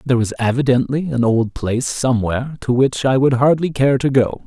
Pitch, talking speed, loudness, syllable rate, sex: 130 Hz, 200 wpm, -17 LUFS, 5.6 syllables/s, male